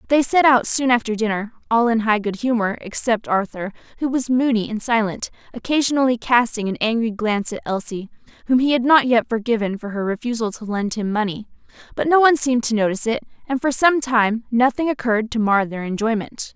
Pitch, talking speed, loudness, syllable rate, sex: 230 Hz, 200 wpm, -19 LUFS, 5.8 syllables/s, female